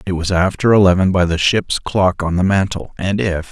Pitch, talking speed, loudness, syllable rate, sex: 95 Hz, 220 wpm, -16 LUFS, 5.1 syllables/s, male